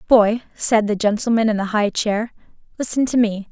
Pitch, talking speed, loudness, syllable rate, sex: 220 Hz, 190 wpm, -19 LUFS, 5.0 syllables/s, female